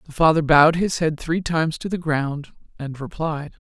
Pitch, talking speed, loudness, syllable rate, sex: 155 Hz, 195 wpm, -20 LUFS, 5.1 syllables/s, female